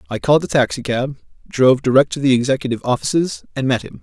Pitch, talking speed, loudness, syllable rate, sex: 135 Hz, 195 wpm, -17 LUFS, 7.0 syllables/s, male